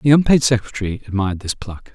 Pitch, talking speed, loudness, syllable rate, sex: 110 Hz, 185 wpm, -18 LUFS, 6.5 syllables/s, male